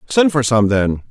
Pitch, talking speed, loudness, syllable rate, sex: 125 Hz, 215 wpm, -15 LUFS, 4.6 syllables/s, male